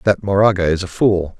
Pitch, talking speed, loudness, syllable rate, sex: 95 Hz, 215 wpm, -16 LUFS, 5.5 syllables/s, male